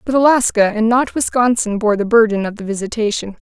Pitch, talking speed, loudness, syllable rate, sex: 220 Hz, 190 wpm, -16 LUFS, 5.8 syllables/s, female